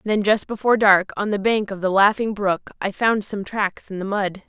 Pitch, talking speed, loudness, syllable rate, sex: 205 Hz, 240 wpm, -20 LUFS, 5.0 syllables/s, female